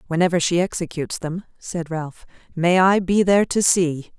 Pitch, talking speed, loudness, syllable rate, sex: 175 Hz, 170 wpm, -20 LUFS, 5.1 syllables/s, female